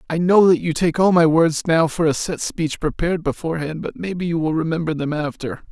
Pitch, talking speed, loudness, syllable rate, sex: 165 Hz, 230 wpm, -19 LUFS, 5.7 syllables/s, male